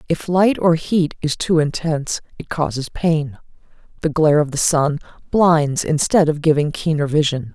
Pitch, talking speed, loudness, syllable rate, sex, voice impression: 155 Hz, 165 wpm, -18 LUFS, 4.7 syllables/s, female, feminine, adult-like, slightly intellectual, slightly calm